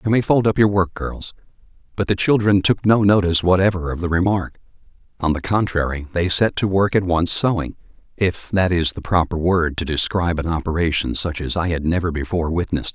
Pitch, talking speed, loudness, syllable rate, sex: 90 Hz, 200 wpm, -19 LUFS, 5.8 syllables/s, male